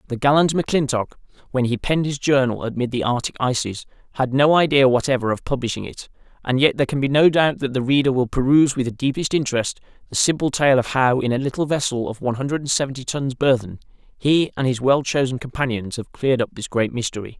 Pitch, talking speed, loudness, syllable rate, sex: 130 Hz, 215 wpm, -20 LUFS, 6.2 syllables/s, male